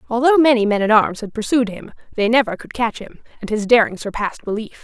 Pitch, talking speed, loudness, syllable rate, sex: 225 Hz, 225 wpm, -18 LUFS, 6.2 syllables/s, female